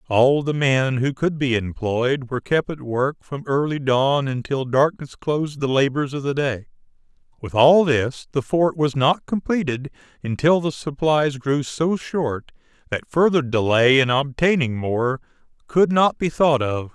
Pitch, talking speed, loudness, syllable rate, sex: 140 Hz, 165 wpm, -20 LUFS, 4.3 syllables/s, male